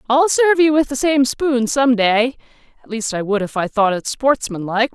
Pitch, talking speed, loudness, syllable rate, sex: 250 Hz, 220 wpm, -17 LUFS, 5.1 syllables/s, female